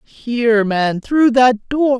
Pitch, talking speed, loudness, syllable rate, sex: 240 Hz, 150 wpm, -15 LUFS, 3.1 syllables/s, female